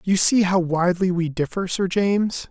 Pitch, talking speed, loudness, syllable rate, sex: 185 Hz, 190 wpm, -20 LUFS, 5.0 syllables/s, male